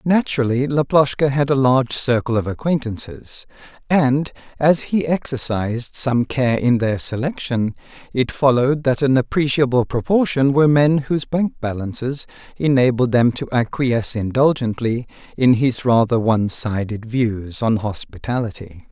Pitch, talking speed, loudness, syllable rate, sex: 125 Hz, 130 wpm, -19 LUFS, 4.7 syllables/s, male